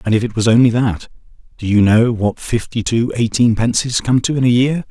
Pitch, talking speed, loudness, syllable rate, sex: 115 Hz, 210 wpm, -15 LUFS, 5.4 syllables/s, male